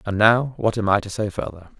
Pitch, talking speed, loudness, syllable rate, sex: 105 Hz, 265 wpm, -21 LUFS, 5.7 syllables/s, male